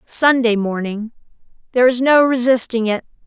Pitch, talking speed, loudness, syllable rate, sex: 240 Hz, 110 wpm, -16 LUFS, 5.1 syllables/s, female